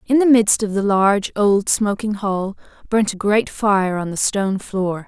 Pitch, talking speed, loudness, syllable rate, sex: 205 Hz, 200 wpm, -18 LUFS, 4.4 syllables/s, female